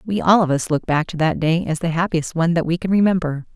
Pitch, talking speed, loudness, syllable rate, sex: 170 Hz, 285 wpm, -19 LUFS, 6.2 syllables/s, female